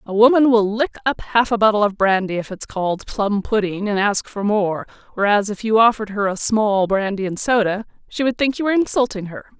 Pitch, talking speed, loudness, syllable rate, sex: 210 Hz, 225 wpm, -19 LUFS, 5.6 syllables/s, female